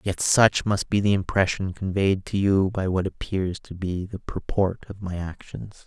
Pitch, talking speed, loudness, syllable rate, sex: 95 Hz, 195 wpm, -24 LUFS, 4.4 syllables/s, male